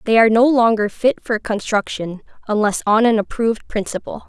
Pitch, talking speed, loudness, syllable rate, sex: 220 Hz, 170 wpm, -17 LUFS, 5.5 syllables/s, female